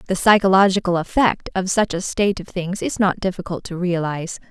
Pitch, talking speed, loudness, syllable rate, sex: 185 Hz, 185 wpm, -19 LUFS, 5.7 syllables/s, female